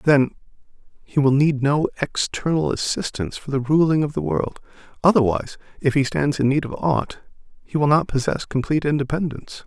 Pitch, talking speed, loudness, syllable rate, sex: 140 Hz, 170 wpm, -21 LUFS, 5.5 syllables/s, male